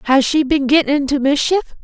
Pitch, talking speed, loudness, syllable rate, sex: 285 Hz, 195 wpm, -15 LUFS, 5.6 syllables/s, female